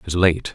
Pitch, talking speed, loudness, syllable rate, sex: 85 Hz, 330 wpm, -19 LUFS, 5.9 syllables/s, male